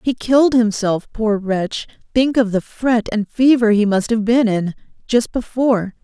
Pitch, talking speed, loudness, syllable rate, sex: 225 Hz, 170 wpm, -17 LUFS, 4.4 syllables/s, female